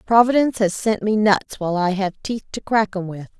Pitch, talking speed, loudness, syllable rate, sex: 205 Hz, 230 wpm, -20 LUFS, 5.6 syllables/s, female